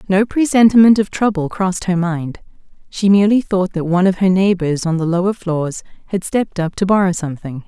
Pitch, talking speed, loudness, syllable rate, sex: 185 Hz, 195 wpm, -16 LUFS, 5.8 syllables/s, female